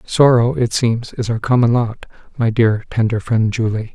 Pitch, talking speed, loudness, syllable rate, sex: 115 Hz, 180 wpm, -16 LUFS, 4.6 syllables/s, male